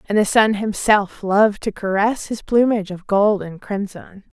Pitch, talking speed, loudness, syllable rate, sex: 205 Hz, 180 wpm, -18 LUFS, 4.8 syllables/s, female